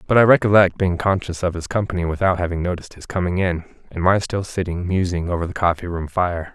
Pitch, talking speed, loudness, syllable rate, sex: 90 Hz, 210 wpm, -20 LUFS, 6.2 syllables/s, male